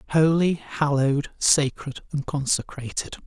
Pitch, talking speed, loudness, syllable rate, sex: 145 Hz, 90 wpm, -23 LUFS, 4.2 syllables/s, male